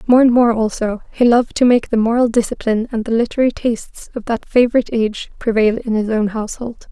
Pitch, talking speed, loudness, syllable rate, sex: 230 Hz, 210 wpm, -16 LUFS, 6.3 syllables/s, female